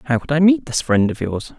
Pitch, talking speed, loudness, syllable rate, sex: 140 Hz, 305 wpm, -18 LUFS, 5.7 syllables/s, male